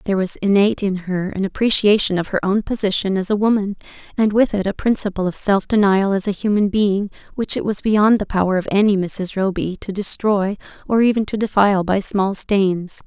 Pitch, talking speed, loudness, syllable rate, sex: 200 Hz, 205 wpm, -18 LUFS, 5.5 syllables/s, female